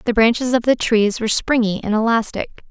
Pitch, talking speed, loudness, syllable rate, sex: 230 Hz, 200 wpm, -18 LUFS, 5.9 syllables/s, female